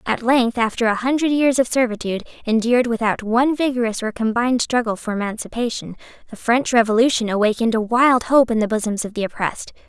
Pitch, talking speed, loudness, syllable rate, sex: 230 Hz, 180 wpm, -19 LUFS, 6.3 syllables/s, female